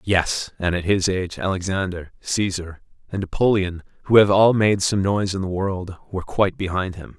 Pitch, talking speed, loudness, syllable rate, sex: 95 Hz, 185 wpm, -21 LUFS, 5.2 syllables/s, male